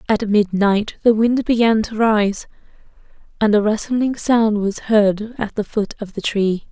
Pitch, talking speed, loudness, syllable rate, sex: 215 Hz, 170 wpm, -18 LUFS, 4.0 syllables/s, female